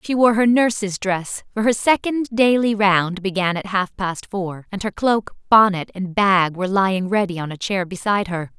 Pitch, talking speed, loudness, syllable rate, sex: 200 Hz, 205 wpm, -19 LUFS, 4.8 syllables/s, female